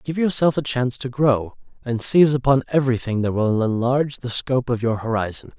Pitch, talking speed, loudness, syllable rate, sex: 125 Hz, 195 wpm, -20 LUFS, 5.9 syllables/s, male